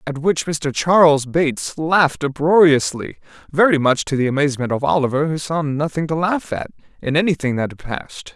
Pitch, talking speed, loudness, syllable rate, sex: 150 Hz, 180 wpm, -18 LUFS, 5.4 syllables/s, male